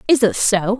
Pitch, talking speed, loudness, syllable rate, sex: 220 Hz, 230 wpm, -16 LUFS, 4.8 syllables/s, female